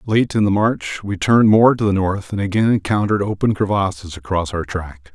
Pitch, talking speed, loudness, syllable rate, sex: 100 Hz, 210 wpm, -18 LUFS, 5.4 syllables/s, male